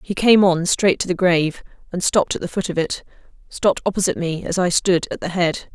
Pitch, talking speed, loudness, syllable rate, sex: 180 Hz, 230 wpm, -19 LUFS, 6.0 syllables/s, female